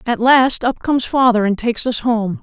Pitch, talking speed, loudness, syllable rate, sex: 235 Hz, 225 wpm, -15 LUFS, 5.2 syllables/s, female